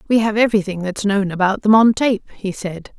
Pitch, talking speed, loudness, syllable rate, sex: 205 Hz, 220 wpm, -17 LUFS, 5.5 syllables/s, female